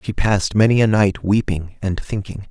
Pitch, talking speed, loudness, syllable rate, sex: 100 Hz, 190 wpm, -18 LUFS, 5.2 syllables/s, male